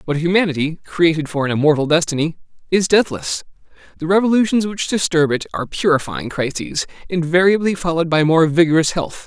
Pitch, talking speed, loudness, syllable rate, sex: 165 Hz, 150 wpm, -17 LUFS, 6.0 syllables/s, male